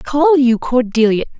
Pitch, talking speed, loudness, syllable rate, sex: 260 Hz, 130 wpm, -14 LUFS, 4.1 syllables/s, female